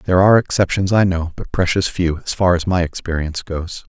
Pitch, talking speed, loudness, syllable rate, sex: 90 Hz, 215 wpm, -18 LUFS, 5.8 syllables/s, male